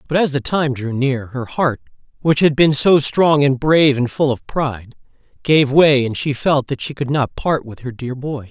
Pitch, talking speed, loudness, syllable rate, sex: 135 Hz, 235 wpm, -17 LUFS, 4.7 syllables/s, male